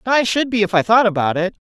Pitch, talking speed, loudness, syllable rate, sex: 210 Hz, 290 wpm, -16 LUFS, 6.2 syllables/s, female